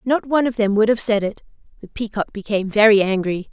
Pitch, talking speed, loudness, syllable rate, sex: 215 Hz, 220 wpm, -18 LUFS, 6.4 syllables/s, female